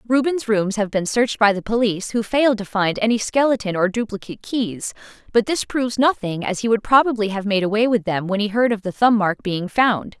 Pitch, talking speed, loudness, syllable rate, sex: 220 Hz, 230 wpm, -19 LUFS, 5.7 syllables/s, female